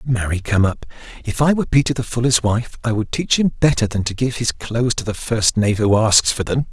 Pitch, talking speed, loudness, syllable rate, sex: 115 Hz, 250 wpm, -18 LUFS, 5.7 syllables/s, male